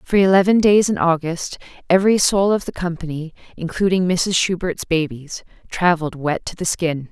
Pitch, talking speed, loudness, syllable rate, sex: 175 Hz, 160 wpm, -18 LUFS, 5.1 syllables/s, female